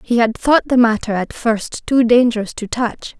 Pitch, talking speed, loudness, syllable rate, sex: 230 Hz, 205 wpm, -16 LUFS, 4.7 syllables/s, female